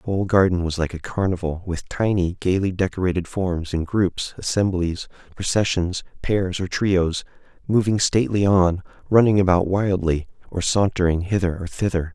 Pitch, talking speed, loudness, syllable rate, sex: 90 Hz, 150 wpm, -21 LUFS, 5.0 syllables/s, male